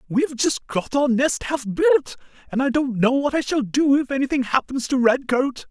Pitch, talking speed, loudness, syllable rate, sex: 255 Hz, 210 wpm, -21 LUFS, 5.2 syllables/s, male